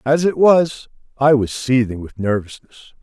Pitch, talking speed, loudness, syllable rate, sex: 130 Hz, 160 wpm, -17 LUFS, 4.7 syllables/s, male